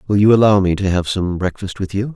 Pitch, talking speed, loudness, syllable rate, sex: 100 Hz, 280 wpm, -16 LUFS, 6.0 syllables/s, male